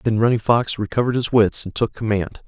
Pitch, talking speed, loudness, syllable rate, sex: 110 Hz, 220 wpm, -19 LUFS, 6.0 syllables/s, male